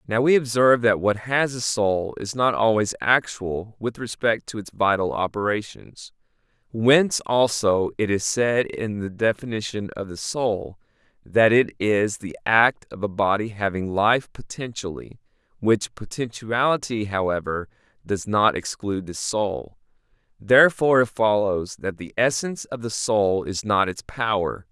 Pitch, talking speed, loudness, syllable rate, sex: 110 Hz, 150 wpm, -22 LUFS, 4.4 syllables/s, male